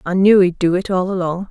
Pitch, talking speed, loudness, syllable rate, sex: 185 Hz, 280 wpm, -16 LUFS, 5.0 syllables/s, female